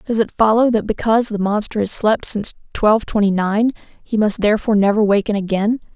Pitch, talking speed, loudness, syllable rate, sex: 215 Hz, 190 wpm, -17 LUFS, 6.2 syllables/s, female